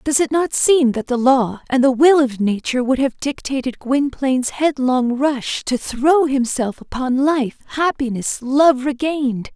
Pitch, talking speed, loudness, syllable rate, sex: 265 Hz, 165 wpm, -18 LUFS, 4.2 syllables/s, female